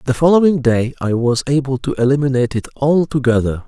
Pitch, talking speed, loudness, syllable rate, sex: 135 Hz, 165 wpm, -16 LUFS, 6.0 syllables/s, male